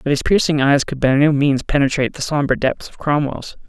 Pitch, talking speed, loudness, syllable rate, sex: 140 Hz, 230 wpm, -17 LUFS, 5.8 syllables/s, male